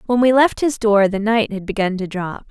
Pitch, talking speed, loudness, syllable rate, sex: 215 Hz, 265 wpm, -17 LUFS, 5.1 syllables/s, female